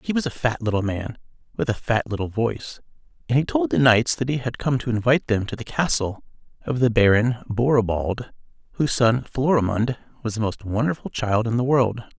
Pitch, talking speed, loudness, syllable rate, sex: 115 Hz, 200 wpm, -22 LUFS, 5.5 syllables/s, male